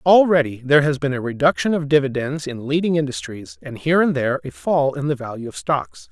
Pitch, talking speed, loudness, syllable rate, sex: 135 Hz, 215 wpm, -20 LUFS, 5.9 syllables/s, male